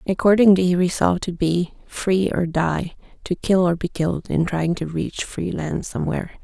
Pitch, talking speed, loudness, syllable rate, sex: 175 Hz, 185 wpm, -21 LUFS, 5.0 syllables/s, female